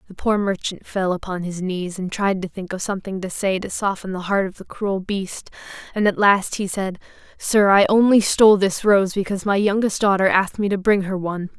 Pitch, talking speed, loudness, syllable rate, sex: 195 Hz, 230 wpm, -20 LUFS, 5.4 syllables/s, female